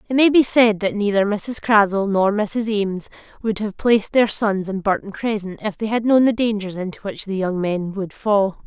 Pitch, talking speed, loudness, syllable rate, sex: 205 Hz, 220 wpm, -19 LUFS, 4.9 syllables/s, female